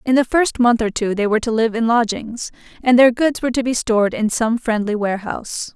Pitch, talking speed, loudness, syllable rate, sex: 230 Hz, 240 wpm, -18 LUFS, 5.8 syllables/s, female